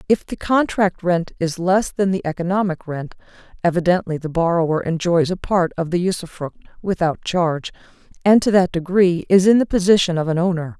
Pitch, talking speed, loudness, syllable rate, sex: 180 Hz, 180 wpm, -19 LUFS, 5.4 syllables/s, female